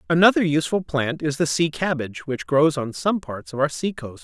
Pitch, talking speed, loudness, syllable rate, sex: 150 Hz, 225 wpm, -22 LUFS, 5.4 syllables/s, male